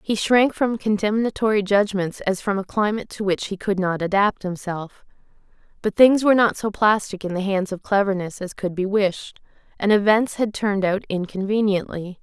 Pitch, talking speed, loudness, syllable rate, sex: 200 Hz, 180 wpm, -21 LUFS, 5.1 syllables/s, female